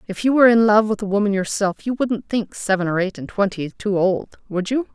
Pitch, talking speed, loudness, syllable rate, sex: 205 Hz, 245 wpm, -20 LUFS, 5.6 syllables/s, female